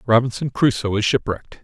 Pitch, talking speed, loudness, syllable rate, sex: 115 Hz, 145 wpm, -20 LUFS, 6.0 syllables/s, male